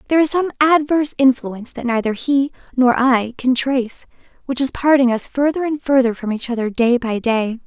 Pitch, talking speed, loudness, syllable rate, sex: 255 Hz, 195 wpm, -17 LUFS, 5.4 syllables/s, female